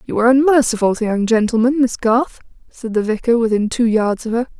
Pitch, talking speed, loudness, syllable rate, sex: 235 Hz, 210 wpm, -16 LUFS, 5.8 syllables/s, female